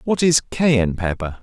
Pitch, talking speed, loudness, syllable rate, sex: 125 Hz, 170 wpm, -18 LUFS, 4.5 syllables/s, male